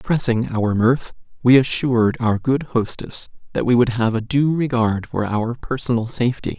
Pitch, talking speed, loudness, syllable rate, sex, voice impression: 120 Hz, 175 wpm, -19 LUFS, 5.0 syllables/s, male, very masculine, slightly middle-aged, thick, relaxed, slightly weak, slightly dark, slightly hard, slightly muffled, fluent, slightly raspy, very cool, very intellectual, slightly refreshing, sincere, very calm, very mature, friendly, reassuring, unique, slightly elegant, wild, sweet, slightly lively, slightly kind, slightly modest